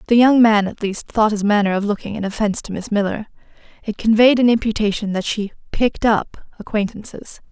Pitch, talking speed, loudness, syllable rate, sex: 215 Hz, 190 wpm, -18 LUFS, 5.8 syllables/s, female